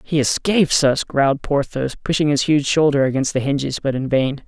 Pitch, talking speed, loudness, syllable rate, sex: 140 Hz, 200 wpm, -18 LUFS, 5.4 syllables/s, male